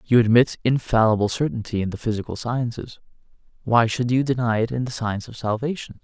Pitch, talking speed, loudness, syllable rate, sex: 115 Hz, 180 wpm, -22 LUFS, 5.9 syllables/s, male